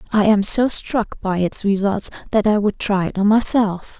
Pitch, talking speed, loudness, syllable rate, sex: 205 Hz, 210 wpm, -18 LUFS, 4.5 syllables/s, female